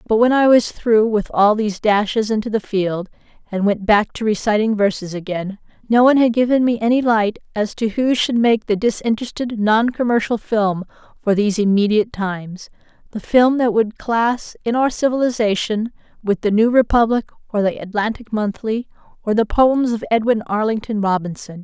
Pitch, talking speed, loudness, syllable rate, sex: 220 Hz, 170 wpm, -18 LUFS, 5.2 syllables/s, female